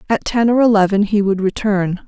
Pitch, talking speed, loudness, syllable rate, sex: 205 Hz, 200 wpm, -15 LUFS, 5.3 syllables/s, female